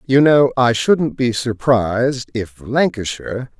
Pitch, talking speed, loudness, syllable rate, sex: 125 Hz, 135 wpm, -17 LUFS, 3.9 syllables/s, male